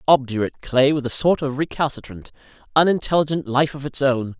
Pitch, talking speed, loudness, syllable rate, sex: 140 Hz, 165 wpm, -20 LUFS, 6.0 syllables/s, male